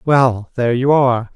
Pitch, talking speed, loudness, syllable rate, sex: 125 Hz, 175 wpm, -15 LUFS, 5.1 syllables/s, male